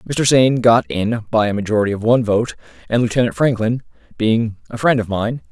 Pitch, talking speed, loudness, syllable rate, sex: 110 Hz, 195 wpm, -17 LUFS, 5.7 syllables/s, male